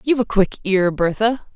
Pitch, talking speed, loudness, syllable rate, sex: 210 Hz, 195 wpm, -19 LUFS, 5.3 syllables/s, female